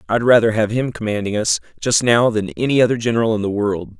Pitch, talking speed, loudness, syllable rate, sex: 110 Hz, 225 wpm, -17 LUFS, 6.1 syllables/s, male